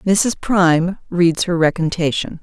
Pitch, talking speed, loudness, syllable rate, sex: 175 Hz, 125 wpm, -17 LUFS, 4.0 syllables/s, female